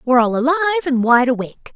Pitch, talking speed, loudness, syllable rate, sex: 270 Hz, 205 wpm, -16 LUFS, 8.3 syllables/s, female